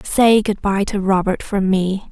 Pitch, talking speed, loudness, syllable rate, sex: 200 Hz, 200 wpm, -17 LUFS, 4.1 syllables/s, female